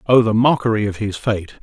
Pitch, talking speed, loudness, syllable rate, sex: 110 Hz, 220 wpm, -17 LUFS, 5.4 syllables/s, male